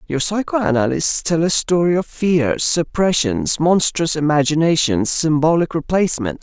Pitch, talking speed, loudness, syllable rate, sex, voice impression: 160 Hz, 110 wpm, -17 LUFS, 4.4 syllables/s, male, masculine, adult-like, tensed, powerful, slightly bright, clear, friendly, wild, lively, slightly intense